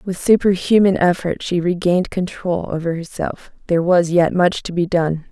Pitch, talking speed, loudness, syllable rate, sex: 175 Hz, 160 wpm, -18 LUFS, 5.0 syllables/s, female